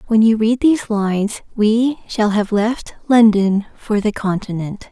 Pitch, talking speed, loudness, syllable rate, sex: 215 Hz, 160 wpm, -17 LUFS, 4.2 syllables/s, female